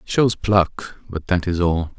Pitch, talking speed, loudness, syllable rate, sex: 90 Hz, 210 wpm, -20 LUFS, 4.0 syllables/s, male